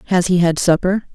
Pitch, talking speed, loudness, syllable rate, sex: 180 Hz, 210 wpm, -16 LUFS, 5.7 syllables/s, female